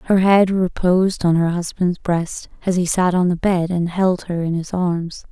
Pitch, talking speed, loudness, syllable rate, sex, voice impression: 180 Hz, 215 wpm, -18 LUFS, 4.3 syllables/s, female, very feminine, slightly young, very thin, very relaxed, very weak, dark, very soft, clear, fluent, raspy, very cute, very intellectual, slightly refreshing, very sincere, very calm, very friendly, very reassuring, very unique, very elegant, wild, very sweet, slightly lively, very kind, very modest, very light